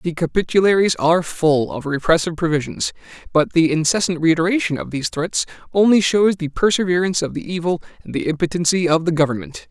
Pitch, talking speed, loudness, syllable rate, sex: 170 Hz, 165 wpm, -18 LUFS, 6.2 syllables/s, male